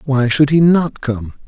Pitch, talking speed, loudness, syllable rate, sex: 135 Hz, 205 wpm, -14 LUFS, 4.0 syllables/s, male